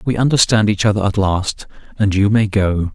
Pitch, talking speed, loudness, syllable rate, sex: 105 Hz, 205 wpm, -16 LUFS, 5.1 syllables/s, male